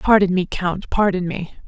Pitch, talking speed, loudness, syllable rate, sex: 185 Hz, 180 wpm, -20 LUFS, 4.6 syllables/s, female